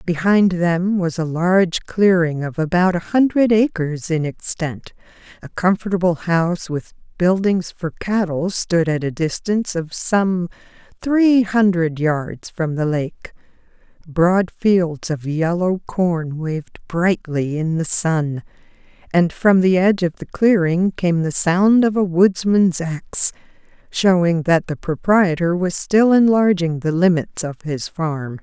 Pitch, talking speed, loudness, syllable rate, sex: 175 Hz, 145 wpm, -18 LUFS, 3.8 syllables/s, female